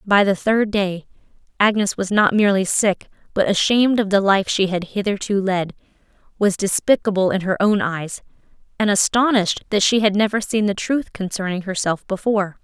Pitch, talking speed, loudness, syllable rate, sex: 200 Hz, 170 wpm, -19 LUFS, 5.3 syllables/s, female